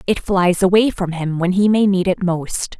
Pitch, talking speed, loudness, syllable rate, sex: 185 Hz, 235 wpm, -17 LUFS, 4.5 syllables/s, female